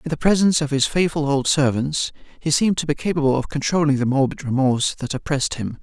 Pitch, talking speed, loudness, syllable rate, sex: 145 Hz, 215 wpm, -20 LUFS, 6.5 syllables/s, male